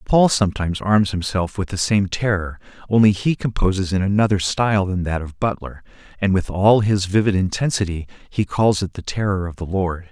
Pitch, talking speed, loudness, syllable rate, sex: 95 Hz, 190 wpm, -19 LUFS, 5.4 syllables/s, male